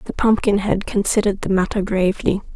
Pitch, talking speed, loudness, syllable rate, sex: 200 Hz, 140 wpm, -19 LUFS, 6.1 syllables/s, female